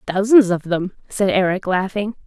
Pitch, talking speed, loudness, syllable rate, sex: 195 Hz, 160 wpm, -18 LUFS, 4.7 syllables/s, female